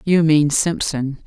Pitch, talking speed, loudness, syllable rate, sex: 155 Hz, 140 wpm, -17 LUFS, 3.5 syllables/s, female